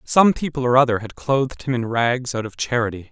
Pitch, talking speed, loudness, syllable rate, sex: 125 Hz, 230 wpm, -20 LUFS, 5.7 syllables/s, male